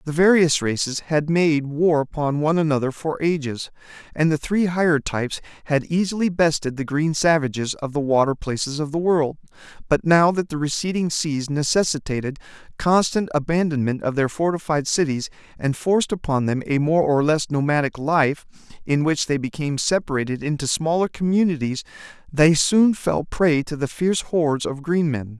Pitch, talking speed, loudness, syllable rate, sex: 155 Hz, 170 wpm, -21 LUFS, 5.2 syllables/s, male